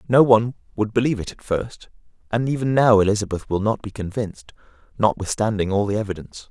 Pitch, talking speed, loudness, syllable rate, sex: 105 Hz, 175 wpm, -21 LUFS, 6.4 syllables/s, male